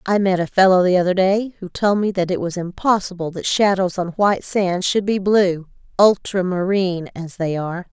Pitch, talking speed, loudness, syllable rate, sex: 185 Hz, 180 wpm, -18 LUFS, 5.1 syllables/s, female